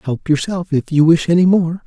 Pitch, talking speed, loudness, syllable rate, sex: 165 Hz, 225 wpm, -15 LUFS, 5.3 syllables/s, male